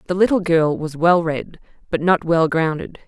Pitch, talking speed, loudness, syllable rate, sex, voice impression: 170 Hz, 195 wpm, -18 LUFS, 4.7 syllables/s, female, very feminine, slightly young, very adult-like, thin, slightly tensed, slightly powerful, slightly dark, slightly hard, clear, fluent, slightly cute, cool, intellectual, very refreshing, sincere, calm, friendly, reassuring, unique, elegant, wild, slightly sweet, lively, slightly strict, slightly intense, slightly light